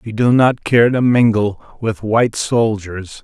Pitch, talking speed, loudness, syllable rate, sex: 115 Hz, 165 wpm, -15 LUFS, 4.1 syllables/s, male